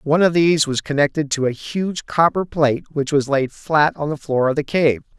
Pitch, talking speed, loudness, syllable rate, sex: 150 Hz, 230 wpm, -19 LUFS, 5.2 syllables/s, male